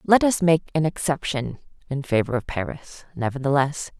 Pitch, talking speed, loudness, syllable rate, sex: 145 Hz, 150 wpm, -23 LUFS, 5.0 syllables/s, female